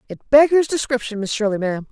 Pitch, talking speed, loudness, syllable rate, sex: 240 Hz, 190 wpm, -18 LUFS, 6.4 syllables/s, female